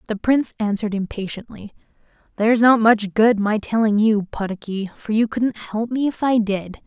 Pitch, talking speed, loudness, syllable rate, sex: 220 Hz, 175 wpm, -19 LUFS, 5.0 syllables/s, female